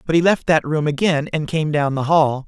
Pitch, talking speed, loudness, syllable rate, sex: 155 Hz, 265 wpm, -18 LUFS, 5.1 syllables/s, male